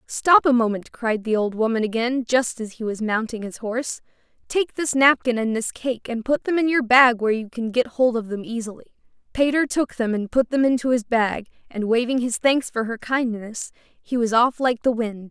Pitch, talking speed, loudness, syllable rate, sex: 240 Hz, 225 wpm, -21 LUFS, 5.0 syllables/s, female